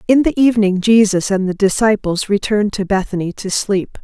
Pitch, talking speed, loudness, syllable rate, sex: 205 Hz, 180 wpm, -15 LUFS, 5.4 syllables/s, female